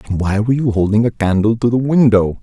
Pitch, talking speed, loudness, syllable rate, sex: 110 Hz, 245 wpm, -15 LUFS, 6.4 syllables/s, male